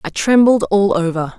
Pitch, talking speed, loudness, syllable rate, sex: 215 Hz, 175 wpm, -14 LUFS, 4.7 syllables/s, female